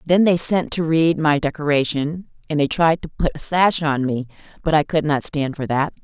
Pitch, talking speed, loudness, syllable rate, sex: 155 Hz, 230 wpm, -19 LUFS, 5.0 syllables/s, female